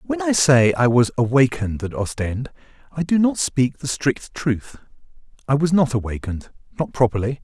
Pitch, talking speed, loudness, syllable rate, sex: 130 Hz, 160 wpm, -20 LUFS, 5.0 syllables/s, male